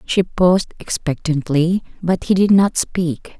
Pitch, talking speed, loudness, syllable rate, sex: 175 Hz, 140 wpm, -17 LUFS, 4.0 syllables/s, female